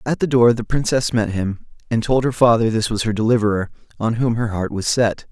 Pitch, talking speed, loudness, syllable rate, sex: 115 Hz, 235 wpm, -19 LUFS, 5.6 syllables/s, male